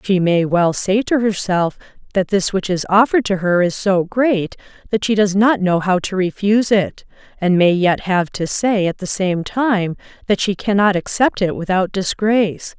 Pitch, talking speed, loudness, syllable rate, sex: 195 Hz, 195 wpm, -17 LUFS, 4.6 syllables/s, female